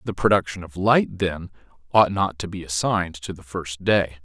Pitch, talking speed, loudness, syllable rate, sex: 90 Hz, 200 wpm, -22 LUFS, 5.0 syllables/s, male